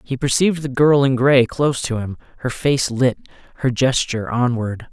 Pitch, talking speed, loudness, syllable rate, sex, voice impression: 130 Hz, 185 wpm, -18 LUFS, 5.1 syllables/s, male, masculine, slightly feminine, gender-neutral, slightly young, slightly adult-like, slightly thick, slightly tensed, powerful, slightly dark, hard, slightly muffled, fluent, slightly cool, intellectual, refreshing, very sincere, very calm, slightly mature, slightly friendly, slightly reassuring, very unique, slightly elegant, slightly sweet, kind, sharp, slightly modest